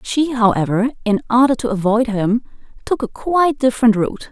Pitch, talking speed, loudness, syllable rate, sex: 235 Hz, 165 wpm, -17 LUFS, 5.6 syllables/s, female